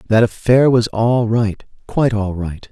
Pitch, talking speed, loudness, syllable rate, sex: 110 Hz, 175 wpm, -16 LUFS, 4.3 syllables/s, male